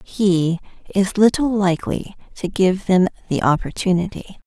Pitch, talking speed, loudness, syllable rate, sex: 190 Hz, 120 wpm, -19 LUFS, 4.7 syllables/s, female